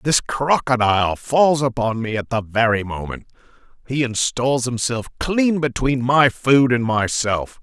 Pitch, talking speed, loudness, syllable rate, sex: 125 Hz, 140 wpm, -19 LUFS, 4.1 syllables/s, male